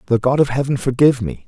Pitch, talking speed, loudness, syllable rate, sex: 125 Hz, 245 wpm, -17 LUFS, 7.1 syllables/s, male